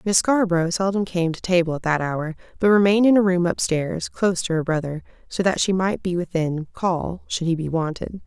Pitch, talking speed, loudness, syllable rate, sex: 175 Hz, 225 wpm, -21 LUFS, 5.4 syllables/s, female